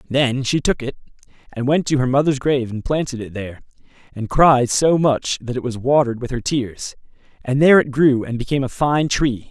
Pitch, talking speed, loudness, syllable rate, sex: 130 Hz, 215 wpm, -18 LUFS, 5.6 syllables/s, male